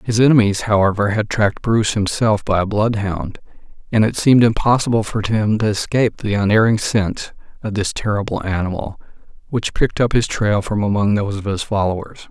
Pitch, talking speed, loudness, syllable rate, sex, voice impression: 105 Hz, 175 wpm, -17 LUFS, 5.6 syllables/s, male, very masculine, very adult-like, very middle-aged, very thick, very tensed, very powerful, slightly dark, hard, clear, slightly fluent, very cool, very intellectual, slightly refreshing, very sincere, very calm, mature, friendly, very reassuring, unique, elegant, wild, very sweet, slightly lively, kind, slightly modest